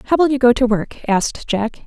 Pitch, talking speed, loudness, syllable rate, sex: 240 Hz, 260 wpm, -17 LUFS, 5.0 syllables/s, female